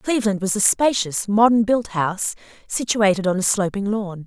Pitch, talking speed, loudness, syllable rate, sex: 205 Hz, 170 wpm, -20 LUFS, 5.1 syllables/s, female